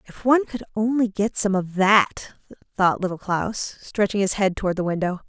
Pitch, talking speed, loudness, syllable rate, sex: 200 Hz, 195 wpm, -22 LUFS, 5.1 syllables/s, female